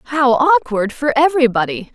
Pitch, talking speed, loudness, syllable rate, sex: 265 Hz, 125 wpm, -15 LUFS, 4.7 syllables/s, female